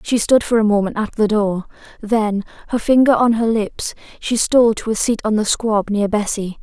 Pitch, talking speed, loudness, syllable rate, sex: 220 Hz, 210 wpm, -17 LUFS, 5.0 syllables/s, female